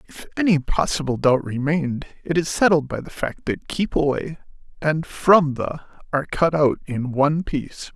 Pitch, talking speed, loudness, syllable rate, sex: 150 Hz, 175 wpm, -21 LUFS, 5.0 syllables/s, male